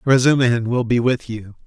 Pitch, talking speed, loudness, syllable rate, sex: 120 Hz, 180 wpm, -18 LUFS, 5.3 syllables/s, male